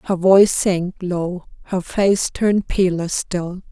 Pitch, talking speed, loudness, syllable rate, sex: 185 Hz, 145 wpm, -18 LUFS, 3.6 syllables/s, female